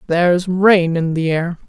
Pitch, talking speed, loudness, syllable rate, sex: 175 Hz, 180 wpm, -15 LUFS, 4.2 syllables/s, female